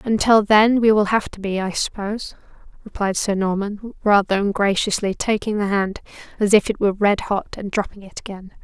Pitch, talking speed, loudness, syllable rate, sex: 205 Hz, 190 wpm, -19 LUFS, 5.4 syllables/s, female